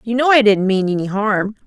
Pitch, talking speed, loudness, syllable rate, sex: 215 Hz, 250 wpm, -15 LUFS, 5.4 syllables/s, female